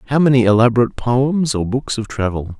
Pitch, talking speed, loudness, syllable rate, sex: 120 Hz, 185 wpm, -16 LUFS, 5.9 syllables/s, male